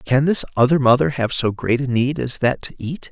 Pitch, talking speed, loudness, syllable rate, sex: 130 Hz, 250 wpm, -18 LUFS, 5.3 syllables/s, male